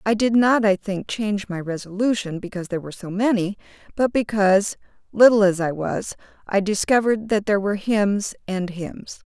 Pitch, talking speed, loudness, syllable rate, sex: 205 Hz, 175 wpm, -21 LUFS, 5.6 syllables/s, female